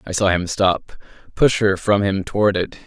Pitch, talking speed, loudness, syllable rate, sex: 100 Hz, 210 wpm, -19 LUFS, 4.7 syllables/s, male